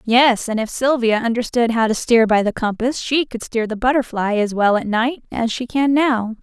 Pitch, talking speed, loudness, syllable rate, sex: 235 Hz, 225 wpm, -18 LUFS, 4.9 syllables/s, female